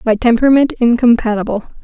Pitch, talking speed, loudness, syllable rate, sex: 235 Hz, 100 wpm, -13 LUFS, 6.3 syllables/s, female